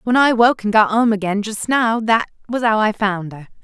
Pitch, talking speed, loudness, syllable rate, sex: 220 Hz, 250 wpm, -17 LUFS, 4.9 syllables/s, female